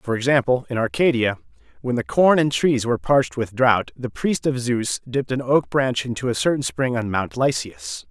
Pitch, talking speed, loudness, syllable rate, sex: 125 Hz, 205 wpm, -21 LUFS, 5.1 syllables/s, male